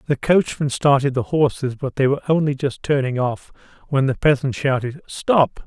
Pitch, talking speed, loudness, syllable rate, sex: 140 Hz, 180 wpm, -19 LUFS, 5.0 syllables/s, male